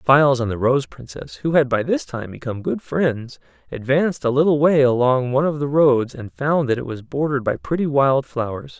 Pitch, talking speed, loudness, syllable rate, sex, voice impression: 135 Hz, 220 wpm, -19 LUFS, 5.3 syllables/s, male, masculine, middle-aged, tensed, powerful, slightly hard, raspy, cool, intellectual, sincere, slightly friendly, wild, lively, strict